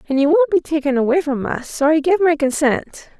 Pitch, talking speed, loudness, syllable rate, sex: 300 Hz, 245 wpm, -17 LUFS, 5.4 syllables/s, female